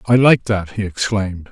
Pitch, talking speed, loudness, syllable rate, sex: 105 Hz, 200 wpm, -17 LUFS, 5.3 syllables/s, male